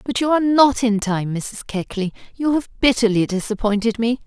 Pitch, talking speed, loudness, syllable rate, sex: 230 Hz, 185 wpm, -19 LUFS, 5.4 syllables/s, female